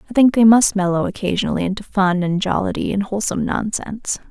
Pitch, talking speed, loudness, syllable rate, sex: 205 Hz, 180 wpm, -18 LUFS, 6.5 syllables/s, female